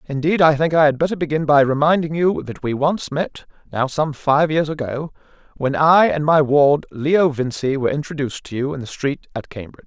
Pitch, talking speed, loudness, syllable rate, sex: 145 Hz, 215 wpm, -18 LUFS, 5.4 syllables/s, male